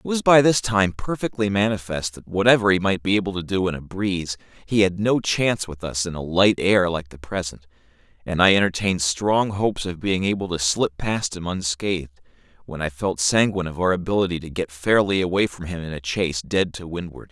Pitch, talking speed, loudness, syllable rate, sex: 95 Hz, 220 wpm, -22 LUFS, 5.7 syllables/s, male